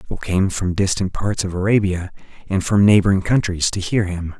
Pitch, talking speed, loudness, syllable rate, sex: 95 Hz, 190 wpm, -19 LUFS, 5.3 syllables/s, male